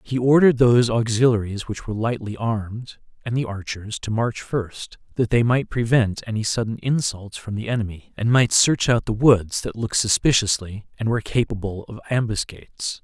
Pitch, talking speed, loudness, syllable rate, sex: 115 Hz, 175 wpm, -21 LUFS, 5.2 syllables/s, male